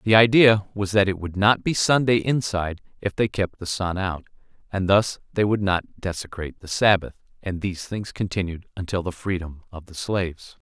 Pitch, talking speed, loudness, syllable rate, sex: 95 Hz, 190 wpm, -23 LUFS, 5.2 syllables/s, male